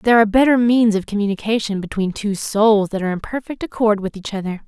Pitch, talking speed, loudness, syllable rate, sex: 215 Hz, 220 wpm, -18 LUFS, 6.3 syllables/s, female